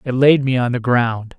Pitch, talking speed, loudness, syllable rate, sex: 125 Hz, 260 wpm, -16 LUFS, 4.7 syllables/s, male